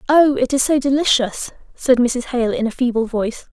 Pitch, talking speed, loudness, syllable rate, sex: 265 Hz, 205 wpm, -17 LUFS, 5.1 syllables/s, female